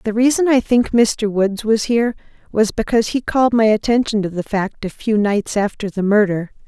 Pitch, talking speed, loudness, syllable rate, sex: 220 Hz, 205 wpm, -17 LUFS, 5.3 syllables/s, female